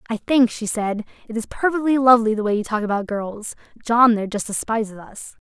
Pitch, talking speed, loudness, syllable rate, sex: 225 Hz, 210 wpm, -20 LUFS, 5.8 syllables/s, female